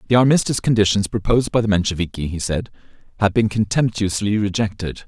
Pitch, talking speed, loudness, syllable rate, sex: 105 Hz, 155 wpm, -19 LUFS, 6.4 syllables/s, male